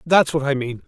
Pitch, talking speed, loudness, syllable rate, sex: 145 Hz, 275 wpm, -20 LUFS, 5.4 syllables/s, male